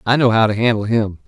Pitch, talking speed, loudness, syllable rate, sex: 110 Hz, 280 wpm, -16 LUFS, 6.4 syllables/s, male